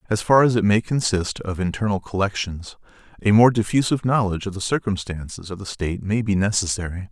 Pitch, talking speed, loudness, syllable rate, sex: 100 Hz, 185 wpm, -21 LUFS, 6.1 syllables/s, male